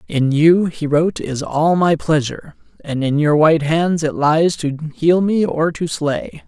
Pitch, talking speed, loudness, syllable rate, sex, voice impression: 155 Hz, 175 wpm, -16 LUFS, 4.2 syllables/s, male, masculine, adult-like, refreshing, sincere, slightly lively